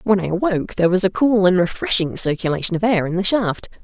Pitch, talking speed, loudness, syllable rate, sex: 190 Hz, 235 wpm, -18 LUFS, 6.3 syllables/s, female